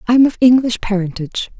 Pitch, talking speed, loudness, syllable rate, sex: 225 Hz, 190 wpm, -15 LUFS, 6.5 syllables/s, female